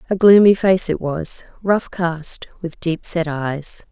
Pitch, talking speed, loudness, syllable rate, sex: 170 Hz, 170 wpm, -18 LUFS, 3.6 syllables/s, female